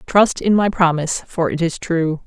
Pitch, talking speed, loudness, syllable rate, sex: 175 Hz, 210 wpm, -18 LUFS, 4.7 syllables/s, female